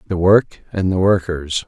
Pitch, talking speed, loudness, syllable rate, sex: 90 Hz, 180 wpm, -17 LUFS, 4.9 syllables/s, male